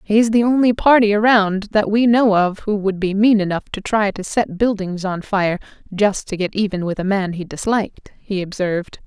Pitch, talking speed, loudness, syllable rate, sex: 205 Hz, 210 wpm, -18 LUFS, 5.0 syllables/s, female